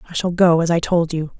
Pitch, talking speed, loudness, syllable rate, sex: 170 Hz, 300 wpm, -17 LUFS, 6.2 syllables/s, female